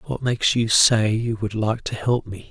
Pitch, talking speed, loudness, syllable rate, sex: 110 Hz, 240 wpm, -20 LUFS, 4.5 syllables/s, male